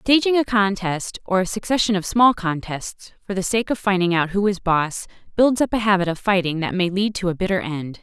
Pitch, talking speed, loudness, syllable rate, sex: 195 Hz, 230 wpm, -20 LUFS, 5.3 syllables/s, female